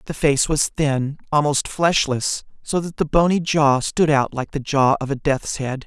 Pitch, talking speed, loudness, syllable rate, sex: 145 Hz, 205 wpm, -20 LUFS, 4.3 syllables/s, male